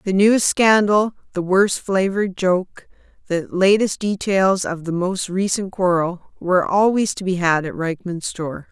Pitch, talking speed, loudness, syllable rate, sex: 190 Hz, 160 wpm, -19 LUFS, 4.5 syllables/s, female